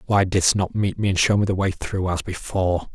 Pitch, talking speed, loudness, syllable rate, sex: 95 Hz, 265 wpm, -21 LUFS, 5.5 syllables/s, male